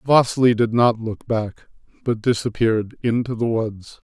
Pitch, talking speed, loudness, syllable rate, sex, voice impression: 115 Hz, 145 wpm, -20 LUFS, 4.5 syllables/s, male, masculine, slightly old, thick, slightly muffled, calm, slightly elegant